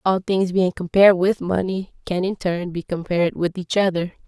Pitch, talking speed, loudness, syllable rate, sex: 185 Hz, 195 wpm, -20 LUFS, 5.1 syllables/s, female